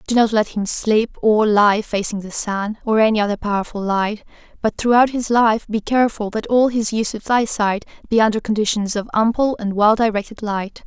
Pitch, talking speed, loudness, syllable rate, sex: 215 Hz, 200 wpm, -18 LUFS, 5.2 syllables/s, female